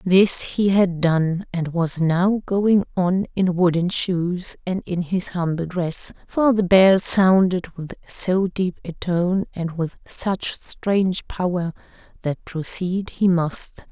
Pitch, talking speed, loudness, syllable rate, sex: 180 Hz, 150 wpm, -21 LUFS, 3.3 syllables/s, female